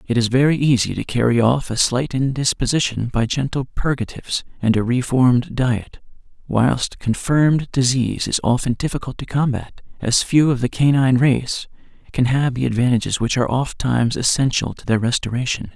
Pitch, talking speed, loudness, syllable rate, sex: 125 Hz, 160 wpm, -19 LUFS, 5.3 syllables/s, male